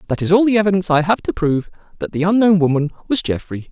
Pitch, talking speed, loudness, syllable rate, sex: 175 Hz, 240 wpm, -17 LUFS, 7.3 syllables/s, male